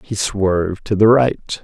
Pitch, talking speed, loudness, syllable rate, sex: 105 Hz, 185 wpm, -16 LUFS, 3.9 syllables/s, male